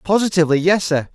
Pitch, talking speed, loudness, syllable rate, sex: 175 Hz, 155 wpm, -16 LUFS, 6.8 syllables/s, male